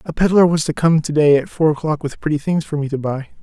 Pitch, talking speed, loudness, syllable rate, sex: 155 Hz, 300 wpm, -17 LUFS, 6.2 syllables/s, male